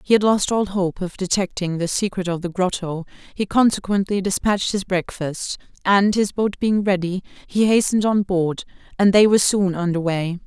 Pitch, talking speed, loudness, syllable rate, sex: 190 Hz, 185 wpm, -20 LUFS, 5.1 syllables/s, female